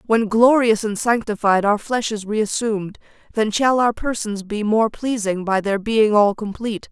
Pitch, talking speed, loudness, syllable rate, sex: 215 Hz, 175 wpm, -19 LUFS, 4.5 syllables/s, female